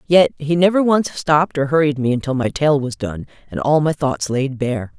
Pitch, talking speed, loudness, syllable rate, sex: 145 Hz, 230 wpm, -18 LUFS, 5.0 syllables/s, female